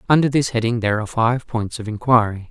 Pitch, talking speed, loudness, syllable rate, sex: 115 Hz, 215 wpm, -19 LUFS, 6.4 syllables/s, male